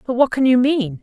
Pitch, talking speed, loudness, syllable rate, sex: 245 Hz, 295 wpm, -16 LUFS, 5.6 syllables/s, female